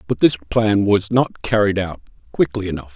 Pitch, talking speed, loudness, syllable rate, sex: 100 Hz, 185 wpm, -18 LUFS, 4.8 syllables/s, male